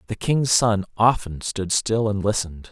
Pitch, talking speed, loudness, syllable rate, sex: 105 Hz, 175 wpm, -21 LUFS, 4.6 syllables/s, male